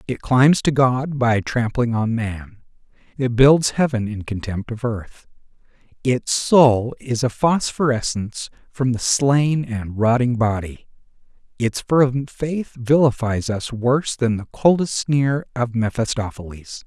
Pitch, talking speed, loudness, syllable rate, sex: 120 Hz, 135 wpm, -19 LUFS, 3.9 syllables/s, male